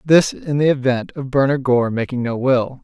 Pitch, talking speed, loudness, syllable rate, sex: 130 Hz, 210 wpm, -18 LUFS, 4.8 syllables/s, male